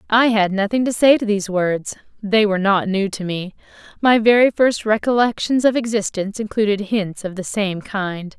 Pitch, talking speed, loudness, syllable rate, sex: 210 Hz, 185 wpm, -18 LUFS, 5.1 syllables/s, female